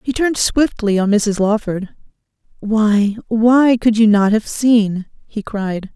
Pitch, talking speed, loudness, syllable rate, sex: 220 Hz, 150 wpm, -15 LUFS, 3.7 syllables/s, female